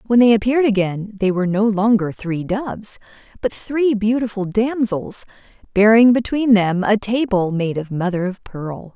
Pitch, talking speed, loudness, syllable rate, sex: 210 Hz, 160 wpm, -18 LUFS, 4.7 syllables/s, female